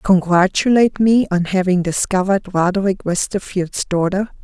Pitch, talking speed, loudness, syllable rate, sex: 190 Hz, 110 wpm, -17 LUFS, 5.0 syllables/s, female